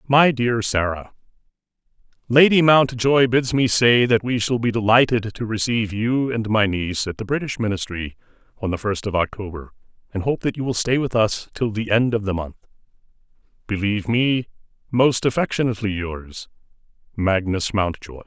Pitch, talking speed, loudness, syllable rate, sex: 115 Hz, 155 wpm, -20 LUFS, 5.1 syllables/s, male